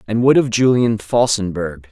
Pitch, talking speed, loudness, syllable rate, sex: 110 Hz, 155 wpm, -16 LUFS, 4.7 syllables/s, male